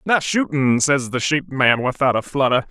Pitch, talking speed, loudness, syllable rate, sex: 140 Hz, 200 wpm, -18 LUFS, 4.7 syllables/s, male